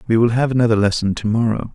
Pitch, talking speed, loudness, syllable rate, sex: 115 Hz, 240 wpm, -17 LUFS, 6.9 syllables/s, male